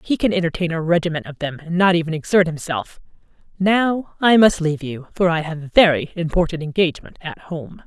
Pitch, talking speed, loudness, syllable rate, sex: 170 Hz, 200 wpm, -19 LUFS, 5.8 syllables/s, female